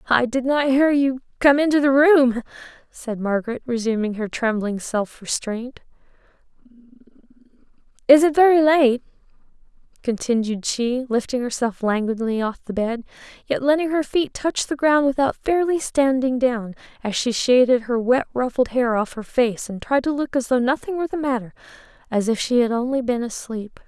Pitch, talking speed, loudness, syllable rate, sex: 250 Hz, 165 wpm, -20 LUFS, 4.9 syllables/s, female